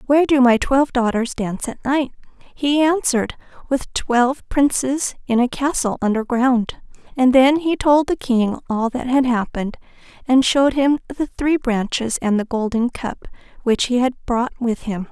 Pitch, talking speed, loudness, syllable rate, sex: 255 Hz, 175 wpm, -19 LUFS, 4.8 syllables/s, female